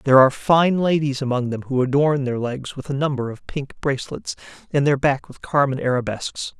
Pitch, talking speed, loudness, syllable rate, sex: 135 Hz, 200 wpm, -21 LUFS, 5.6 syllables/s, male